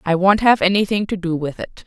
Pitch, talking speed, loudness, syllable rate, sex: 190 Hz, 260 wpm, -17 LUFS, 5.7 syllables/s, female